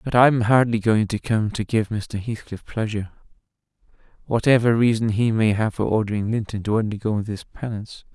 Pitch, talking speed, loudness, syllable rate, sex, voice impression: 110 Hz, 170 wpm, -22 LUFS, 5.4 syllables/s, male, masculine, adult-like, relaxed, weak, dark, fluent, slightly sincere, calm, modest